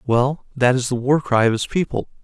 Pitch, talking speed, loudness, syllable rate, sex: 130 Hz, 240 wpm, -19 LUFS, 5.2 syllables/s, male